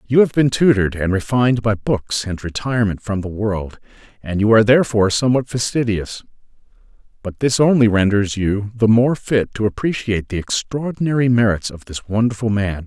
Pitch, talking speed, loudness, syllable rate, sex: 110 Hz, 170 wpm, -18 LUFS, 5.6 syllables/s, male